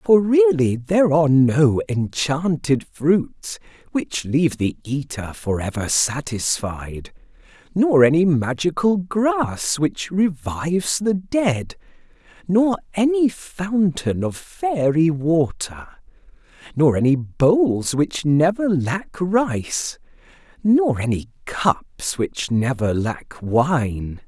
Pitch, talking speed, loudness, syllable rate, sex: 160 Hz, 90 wpm, -20 LUFS, 3.2 syllables/s, male